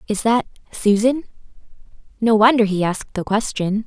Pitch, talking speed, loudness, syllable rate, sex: 215 Hz, 125 wpm, -18 LUFS, 5.2 syllables/s, female